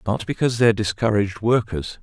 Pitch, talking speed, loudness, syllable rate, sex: 105 Hz, 180 wpm, -20 LUFS, 6.9 syllables/s, male